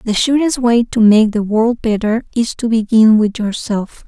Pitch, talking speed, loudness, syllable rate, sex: 225 Hz, 190 wpm, -14 LUFS, 4.4 syllables/s, female